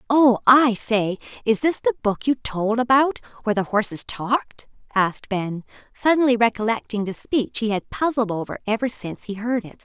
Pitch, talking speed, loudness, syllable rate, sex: 230 Hz, 175 wpm, -21 LUFS, 5.2 syllables/s, female